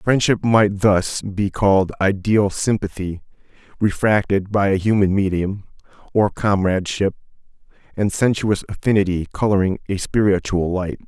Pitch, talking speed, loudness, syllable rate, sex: 100 Hz, 115 wpm, -19 LUFS, 4.7 syllables/s, male